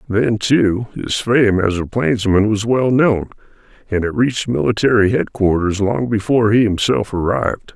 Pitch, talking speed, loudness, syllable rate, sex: 105 Hz, 155 wpm, -16 LUFS, 4.7 syllables/s, male